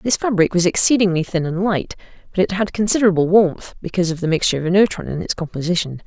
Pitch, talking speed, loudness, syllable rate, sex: 180 Hz, 210 wpm, -18 LUFS, 6.8 syllables/s, female